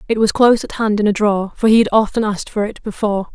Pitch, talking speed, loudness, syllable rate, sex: 210 Hz, 285 wpm, -16 LUFS, 7.2 syllables/s, female